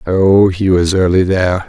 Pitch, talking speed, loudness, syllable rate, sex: 95 Hz, 180 wpm, -12 LUFS, 4.6 syllables/s, male